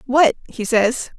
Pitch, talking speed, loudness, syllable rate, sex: 245 Hz, 150 wpm, -18 LUFS, 3.7 syllables/s, female